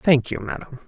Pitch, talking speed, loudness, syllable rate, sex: 130 Hz, 205 wpm, -24 LUFS, 5.1 syllables/s, male